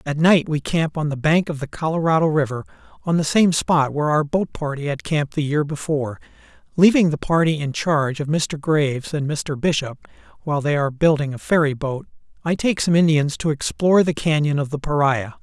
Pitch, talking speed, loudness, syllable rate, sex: 150 Hz, 200 wpm, -20 LUFS, 5.6 syllables/s, male